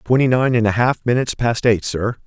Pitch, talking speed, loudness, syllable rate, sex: 120 Hz, 240 wpm, -17 LUFS, 5.7 syllables/s, male